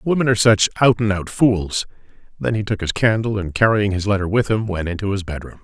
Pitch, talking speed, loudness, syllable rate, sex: 100 Hz, 235 wpm, -18 LUFS, 5.9 syllables/s, male